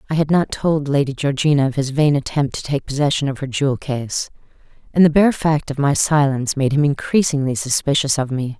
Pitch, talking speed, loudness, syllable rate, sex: 140 Hz, 210 wpm, -18 LUFS, 5.7 syllables/s, female